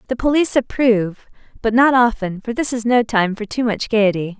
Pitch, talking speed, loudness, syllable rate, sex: 230 Hz, 190 wpm, -17 LUFS, 5.5 syllables/s, female